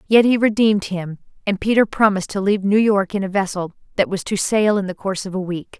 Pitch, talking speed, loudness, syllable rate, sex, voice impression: 195 Hz, 250 wpm, -19 LUFS, 6.2 syllables/s, female, feminine, slightly adult-like, sincere, slightly calm, slightly friendly